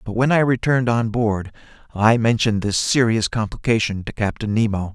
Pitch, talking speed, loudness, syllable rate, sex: 110 Hz, 170 wpm, -19 LUFS, 5.4 syllables/s, male